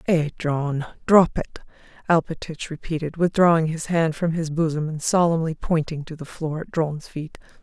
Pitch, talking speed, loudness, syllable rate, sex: 160 Hz, 165 wpm, -23 LUFS, 4.8 syllables/s, female